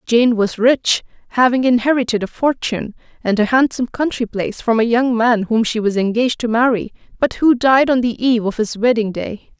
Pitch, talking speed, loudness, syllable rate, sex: 235 Hz, 200 wpm, -16 LUFS, 5.5 syllables/s, female